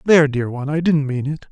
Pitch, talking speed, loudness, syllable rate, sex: 145 Hz, 275 wpm, -18 LUFS, 7.1 syllables/s, male